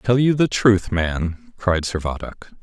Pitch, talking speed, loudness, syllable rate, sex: 100 Hz, 160 wpm, -20 LUFS, 4.0 syllables/s, male